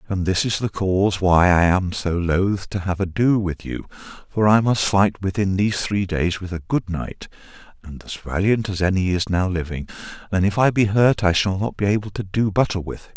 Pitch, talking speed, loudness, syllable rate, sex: 95 Hz, 230 wpm, -20 LUFS, 5.1 syllables/s, male